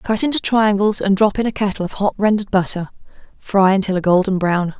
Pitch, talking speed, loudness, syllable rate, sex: 200 Hz, 215 wpm, -17 LUFS, 5.9 syllables/s, female